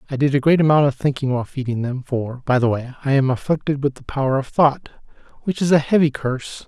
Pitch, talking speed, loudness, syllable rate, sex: 140 Hz, 235 wpm, -19 LUFS, 6.3 syllables/s, male